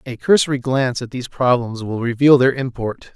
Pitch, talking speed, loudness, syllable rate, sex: 125 Hz, 190 wpm, -18 LUFS, 5.6 syllables/s, male